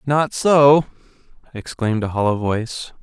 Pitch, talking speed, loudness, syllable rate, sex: 125 Hz, 120 wpm, -18 LUFS, 4.6 syllables/s, male